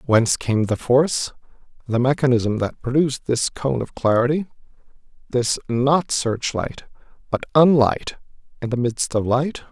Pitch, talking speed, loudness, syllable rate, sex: 125 Hz, 135 wpm, -20 LUFS, 4.5 syllables/s, male